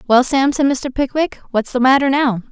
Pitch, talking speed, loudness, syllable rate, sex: 265 Hz, 215 wpm, -16 LUFS, 5.1 syllables/s, female